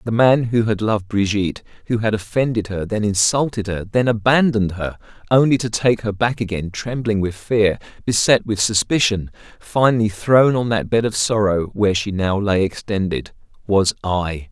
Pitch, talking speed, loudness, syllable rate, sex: 105 Hz, 175 wpm, -18 LUFS, 5.0 syllables/s, male